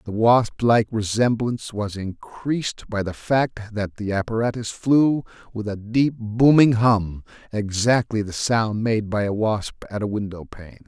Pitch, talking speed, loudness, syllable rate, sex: 110 Hz, 155 wpm, -22 LUFS, 4.4 syllables/s, male